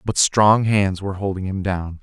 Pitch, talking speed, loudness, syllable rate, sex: 100 Hz, 205 wpm, -19 LUFS, 4.7 syllables/s, male